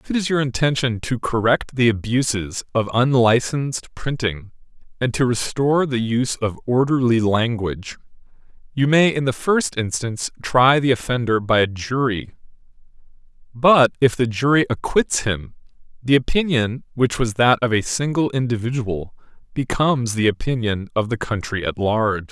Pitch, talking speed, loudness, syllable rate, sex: 120 Hz, 150 wpm, -20 LUFS, 4.9 syllables/s, male